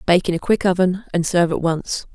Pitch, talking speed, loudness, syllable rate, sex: 180 Hz, 250 wpm, -19 LUFS, 5.9 syllables/s, female